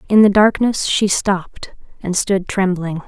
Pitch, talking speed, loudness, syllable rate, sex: 195 Hz, 155 wpm, -16 LUFS, 4.3 syllables/s, female